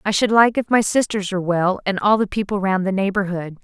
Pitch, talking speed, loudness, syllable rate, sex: 195 Hz, 250 wpm, -19 LUFS, 5.8 syllables/s, female